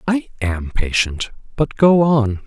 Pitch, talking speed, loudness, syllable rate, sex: 120 Hz, 145 wpm, -18 LUFS, 3.6 syllables/s, male